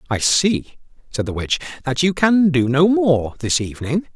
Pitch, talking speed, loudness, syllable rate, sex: 145 Hz, 190 wpm, -18 LUFS, 4.6 syllables/s, male